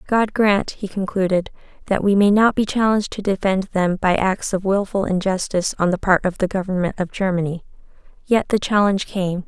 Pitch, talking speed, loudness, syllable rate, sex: 195 Hz, 190 wpm, -19 LUFS, 5.4 syllables/s, female